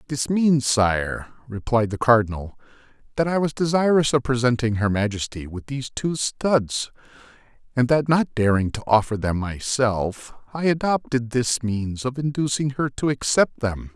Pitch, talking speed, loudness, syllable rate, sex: 125 Hz, 155 wpm, -22 LUFS, 4.6 syllables/s, male